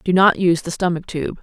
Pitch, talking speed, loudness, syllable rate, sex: 175 Hz, 255 wpm, -18 LUFS, 6.1 syllables/s, female